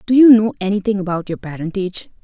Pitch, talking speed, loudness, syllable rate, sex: 200 Hz, 190 wpm, -16 LUFS, 6.7 syllables/s, female